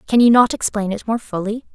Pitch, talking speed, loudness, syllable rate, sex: 220 Hz, 240 wpm, -17 LUFS, 5.9 syllables/s, female